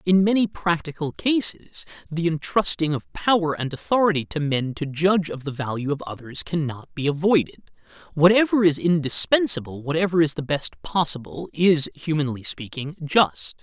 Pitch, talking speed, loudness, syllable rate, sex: 160 Hz, 150 wpm, -22 LUFS, 5.0 syllables/s, male